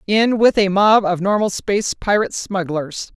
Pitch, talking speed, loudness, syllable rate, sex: 200 Hz, 170 wpm, -17 LUFS, 4.7 syllables/s, female